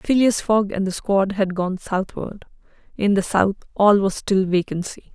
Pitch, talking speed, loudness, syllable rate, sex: 195 Hz, 175 wpm, -20 LUFS, 4.4 syllables/s, female